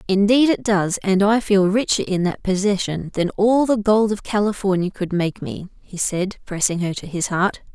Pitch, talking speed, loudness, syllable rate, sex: 195 Hz, 200 wpm, -20 LUFS, 4.7 syllables/s, female